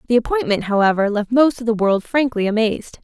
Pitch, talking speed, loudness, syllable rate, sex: 230 Hz, 195 wpm, -18 LUFS, 6.0 syllables/s, female